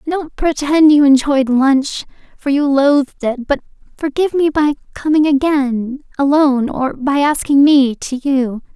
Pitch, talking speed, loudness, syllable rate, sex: 280 Hz, 150 wpm, -14 LUFS, 4.3 syllables/s, female